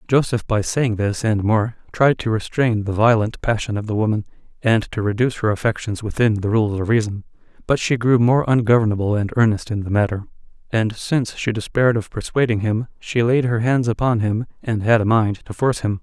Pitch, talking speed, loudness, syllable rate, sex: 110 Hz, 205 wpm, -19 LUFS, 5.6 syllables/s, male